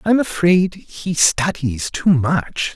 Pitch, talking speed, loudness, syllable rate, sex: 160 Hz, 130 wpm, -17 LUFS, 3.0 syllables/s, male